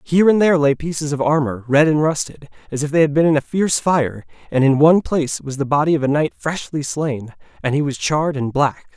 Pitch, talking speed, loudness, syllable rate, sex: 150 Hz, 250 wpm, -18 LUFS, 6.1 syllables/s, male